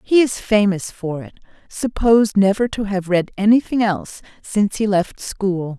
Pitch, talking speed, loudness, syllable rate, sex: 205 Hz, 155 wpm, -18 LUFS, 4.7 syllables/s, female